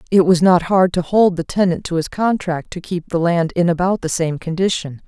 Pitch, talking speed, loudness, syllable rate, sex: 175 Hz, 235 wpm, -17 LUFS, 5.2 syllables/s, female